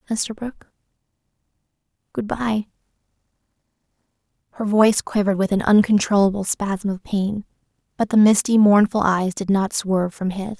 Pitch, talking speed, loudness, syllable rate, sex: 205 Hz, 125 wpm, -19 LUFS, 5.3 syllables/s, female